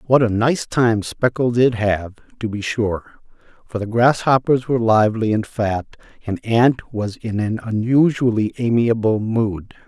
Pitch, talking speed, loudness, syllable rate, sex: 115 Hz, 150 wpm, -19 LUFS, 4.2 syllables/s, male